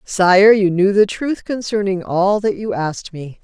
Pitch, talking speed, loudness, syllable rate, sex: 195 Hz, 190 wpm, -16 LUFS, 4.2 syllables/s, female